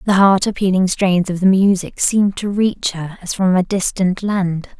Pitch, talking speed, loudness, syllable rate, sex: 190 Hz, 200 wpm, -16 LUFS, 4.6 syllables/s, female